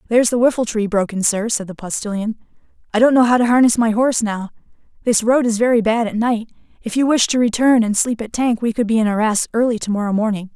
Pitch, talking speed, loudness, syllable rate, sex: 225 Hz, 245 wpm, -17 LUFS, 6.5 syllables/s, female